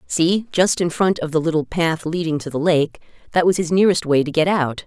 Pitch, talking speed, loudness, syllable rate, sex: 165 Hz, 245 wpm, -19 LUFS, 5.5 syllables/s, female